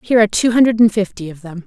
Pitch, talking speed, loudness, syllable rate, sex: 210 Hz, 290 wpm, -14 LUFS, 7.6 syllables/s, female